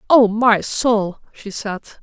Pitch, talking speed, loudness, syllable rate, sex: 220 Hz, 150 wpm, -17 LUFS, 3.1 syllables/s, female